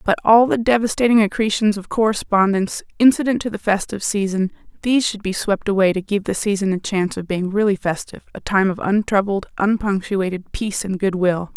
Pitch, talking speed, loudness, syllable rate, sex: 205 Hz, 185 wpm, -19 LUFS, 5.9 syllables/s, female